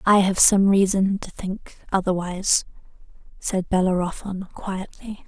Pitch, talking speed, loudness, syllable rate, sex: 190 Hz, 115 wpm, -22 LUFS, 4.3 syllables/s, female